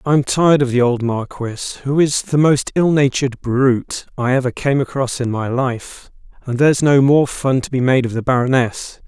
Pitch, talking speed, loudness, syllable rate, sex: 130 Hz, 200 wpm, -16 LUFS, 5.0 syllables/s, male